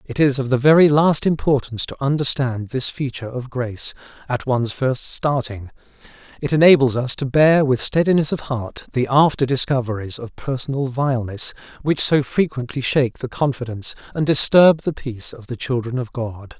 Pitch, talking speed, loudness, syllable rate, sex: 130 Hz, 170 wpm, -19 LUFS, 5.3 syllables/s, male